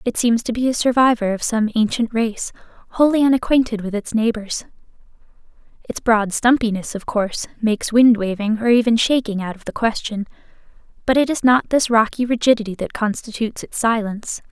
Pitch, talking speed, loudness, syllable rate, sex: 230 Hz, 170 wpm, -18 LUFS, 5.6 syllables/s, female